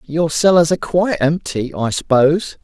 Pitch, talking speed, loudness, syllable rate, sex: 155 Hz, 160 wpm, -16 LUFS, 4.8 syllables/s, male